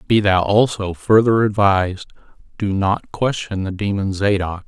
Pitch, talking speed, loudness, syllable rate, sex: 100 Hz, 140 wpm, -18 LUFS, 4.5 syllables/s, male